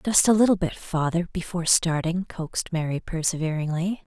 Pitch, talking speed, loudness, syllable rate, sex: 170 Hz, 145 wpm, -24 LUFS, 5.6 syllables/s, female